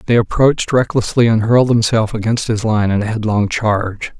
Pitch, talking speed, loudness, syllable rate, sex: 110 Hz, 185 wpm, -15 LUFS, 5.8 syllables/s, male